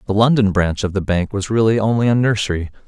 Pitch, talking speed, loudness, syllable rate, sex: 105 Hz, 230 wpm, -17 LUFS, 6.2 syllables/s, male